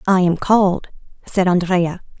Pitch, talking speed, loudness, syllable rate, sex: 185 Hz, 135 wpm, -17 LUFS, 4.5 syllables/s, female